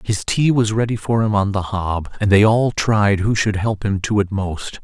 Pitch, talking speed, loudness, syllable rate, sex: 105 Hz, 250 wpm, -18 LUFS, 4.5 syllables/s, male